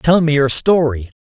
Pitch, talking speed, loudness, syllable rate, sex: 145 Hz, 195 wpm, -15 LUFS, 4.6 syllables/s, male